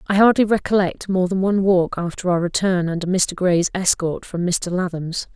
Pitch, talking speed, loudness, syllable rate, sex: 180 Hz, 190 wpm, -19 LUFS, 5.1 syllables/s, female